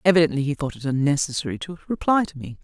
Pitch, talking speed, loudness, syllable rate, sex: 155 Hz, 205 wpm, -23 LUFS, 7.0 syllables/s, female